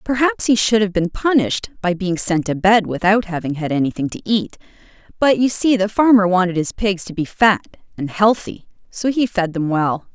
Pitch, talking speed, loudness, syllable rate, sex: 200 Hz, 205 wpm, -17 LUFS, 5.1 syllables/s, female